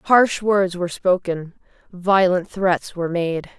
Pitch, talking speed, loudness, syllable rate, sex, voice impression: 185 Hz, 135 wpm, -20 LUFS, 3.9 syllables/s, female, feminine, adult-like, tensed, powerful, slightly hard, clear, fluent, intellectual, slightly elegant, slightly strict, slightly sharp